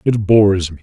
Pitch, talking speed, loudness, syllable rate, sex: 100 Hz, 220 wpm, -13 LUFS, 5.6 syllables/s, male